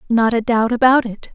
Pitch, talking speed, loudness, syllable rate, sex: 235 Hz, 225 wpm, -16 LUFS, 5.2 syllables/s, female